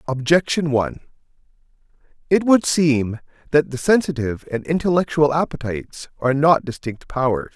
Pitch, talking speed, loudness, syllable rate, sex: 145 Hz, 120 wpm, -19 LUFS, 5.3 syllables/s, male